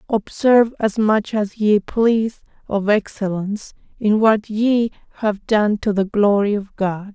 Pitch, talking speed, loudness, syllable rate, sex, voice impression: 210 Hz, 150 wpm, -18 LUFS, 4.1 syllables/s, female, very gender-neutral, adult-like, thin, slightly relaxed, slightly weak, slightly dark, soft, clear, fluent, very cute, very intellectual, refreshing, very sincere, very calm, very friendly, very reassuring, very unique, very elegant, very sweet, slightly lively, very kind, modest, light